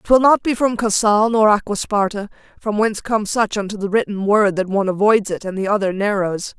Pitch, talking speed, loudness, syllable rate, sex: 205 Hz, 210 wpm, -18 LUFS, 5.5 syllables/s, female